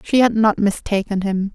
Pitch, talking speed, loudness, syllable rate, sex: 205 Hz, 195 wpm, -18 LUFS, 4.8 syllables/s, female